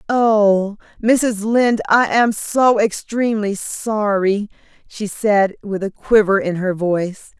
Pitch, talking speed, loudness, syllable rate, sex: 210 Hz, 130 wpm, -17 LUFS, 3.6 syllables/s, female